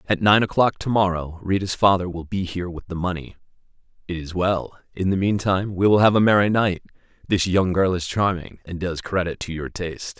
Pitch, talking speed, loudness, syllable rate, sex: 90 Hz, 205 wpm, -21 LUFS, 5.1 syllables/s, male